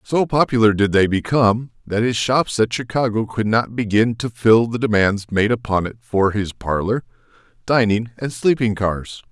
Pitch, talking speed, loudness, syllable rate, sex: 110 Hz, 175 wpm, -18 LUFS, 4.7 syllables/s, male